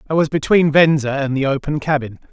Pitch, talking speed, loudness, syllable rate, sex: 145 Hz, 205 wpm, -16 LUFS, 6.0 syllables/s, male